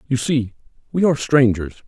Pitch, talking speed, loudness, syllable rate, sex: 125 Hz, 160 wpm, -19 LUFS, 5.7 syllables/s, male